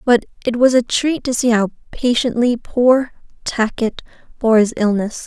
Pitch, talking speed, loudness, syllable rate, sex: 235 Hz, 160 wpm, -17 LUFS, 4.5 syllables/s, female